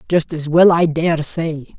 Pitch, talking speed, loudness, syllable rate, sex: 160 Hz, 170 wpm, -16 LUFS, 4.3 syllables/s, female